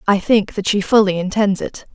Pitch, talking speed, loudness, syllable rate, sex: 200 Hz, 215 wpm, -16 LUFS, 5.1 syllables/s, female